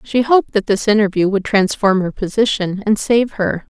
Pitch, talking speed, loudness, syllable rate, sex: 210 Hz, 190 wpm, -16 LUFS, 5.0 syllables/s, female